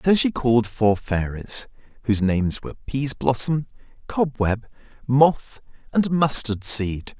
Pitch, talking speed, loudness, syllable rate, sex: 125 Hz, 110 wpm, -22 LUFS, 4.5 syllables/s, male